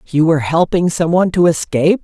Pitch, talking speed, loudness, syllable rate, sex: 170 Hz, 205 wpm, -14 LUFS, 6.7 syllables/s, female